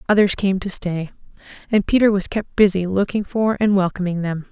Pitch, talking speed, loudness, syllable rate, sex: 195 Hz, 185 wpm, -19 LUFS, 5.3 syllables/s, female